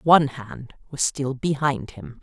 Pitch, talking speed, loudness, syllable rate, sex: 130 Hz, 160 wpm, -23 LUFS, 4.0 syllables/s, female